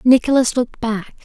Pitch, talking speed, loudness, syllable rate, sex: 240 Hz, 145 wpm, -17 LUFS, 5.5 syllables/s, female